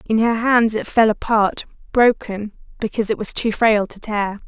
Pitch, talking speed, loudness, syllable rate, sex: 215 Hz, 190 wpm, -18 LUFS, 4.8 syllables/s, female